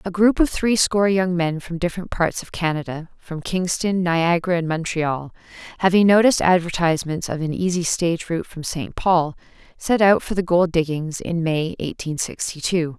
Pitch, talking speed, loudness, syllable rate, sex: 175 Hz, 175 wpm, -20 LUFS, 5.1 syllables/s, female